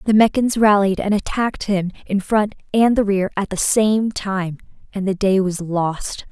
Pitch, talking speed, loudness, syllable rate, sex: 200 Hz, 190 wpm, -19 LUFS, 4.4 syllables/s, female